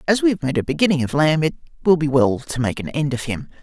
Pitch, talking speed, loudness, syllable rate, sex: 150 Hz, 300 wpm, -20 LUFS, 6.5 syllables/s, male